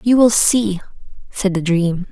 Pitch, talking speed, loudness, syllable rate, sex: 200 Hz, 170 wpm, -16 LUFS, 4.0 syllables/s, female